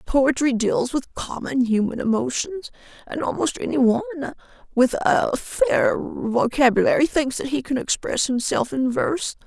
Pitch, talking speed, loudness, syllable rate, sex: 265 Hz, 140 wpm, -21 LUFS, 4.7 syllables/s, female